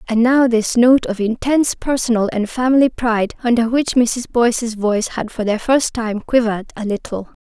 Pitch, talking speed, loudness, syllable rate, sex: 235 Hz, 185 wpm, -17 LUFS, 5.1 syllables/s, female